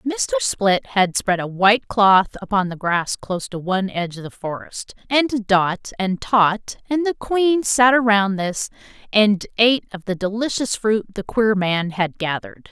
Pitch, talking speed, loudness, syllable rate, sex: 210 Hz, 180 wpm, -19 LUFS, 4.3 syllables/s, female